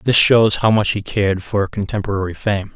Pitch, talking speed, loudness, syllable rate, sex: 105 Hz, 195 wpm, -17 LUFS, 5.2 syllables/s, male